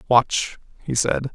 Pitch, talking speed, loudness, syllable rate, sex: 125 Hz, 135 wpm, -22 LUFS, 3.4 syllables/s, male